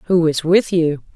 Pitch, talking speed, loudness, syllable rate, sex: 165 Hz, 205 wpm, -16 LUFS, 3.9 syllables/s, female